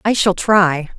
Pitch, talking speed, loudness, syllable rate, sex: 185 Hz, 180 wpm, -15 LUFS, 3.7 syllables/s, female